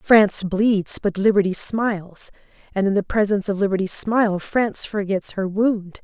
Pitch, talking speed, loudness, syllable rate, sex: 200 Hz, 160 wpm, -20 LUFS, 4.9 syllables/s, female